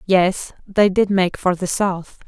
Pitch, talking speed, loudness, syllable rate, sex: 185 Hz, 185 wpm, -18 LUFS, 3.5 syllables/s, female